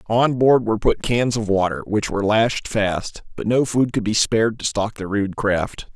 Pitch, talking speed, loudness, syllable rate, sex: 110 Hz, 220 wpm, -20 LUFS, 4.6 syllables/s, male